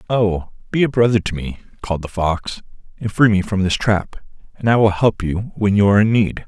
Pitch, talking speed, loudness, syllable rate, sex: 100 Hz, 230 wpm, -18 LUFS, 5.5 syllables/s, male